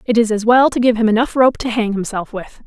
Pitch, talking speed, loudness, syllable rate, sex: 225 Hz, 290 wpm, -15 LUFS, 5.9 syllables/s, female